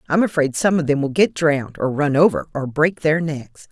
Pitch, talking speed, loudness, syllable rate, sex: 155 Hz, 245 wpm, -19 LUFS, 5.2 syllables/s, female